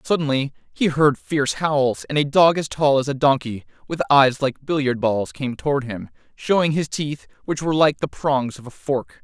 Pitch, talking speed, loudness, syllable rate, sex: 140 Hz, 210 wpm, -20 LUFS, 4.9 syllables/s, male